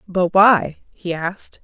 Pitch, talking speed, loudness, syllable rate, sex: 185 Hz, 145 wpm, -17 LUFS, 3.5 syllables/s, female